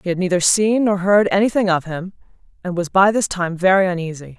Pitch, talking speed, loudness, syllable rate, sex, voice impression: 185 Hz, 220 wpm, -17 LUFS, 5.8 syllables/s, female, very feminine, very adult-like, middle-aged, thin, tensed, slightly powerful, slightly dark, very hard, very clear, very fluent, slightly raspy, slightly cute, cool, very intellectual, refreshing, very sincere, very calm, friendly, reassuring, unique, very elegant, wild, very sweet, slightly lively, kind, slightly sharp, slightly modest, light